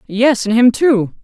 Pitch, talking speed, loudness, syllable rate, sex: 235 Hz, 195 wpm, -13 LUFS, 4.0 syllables/s, female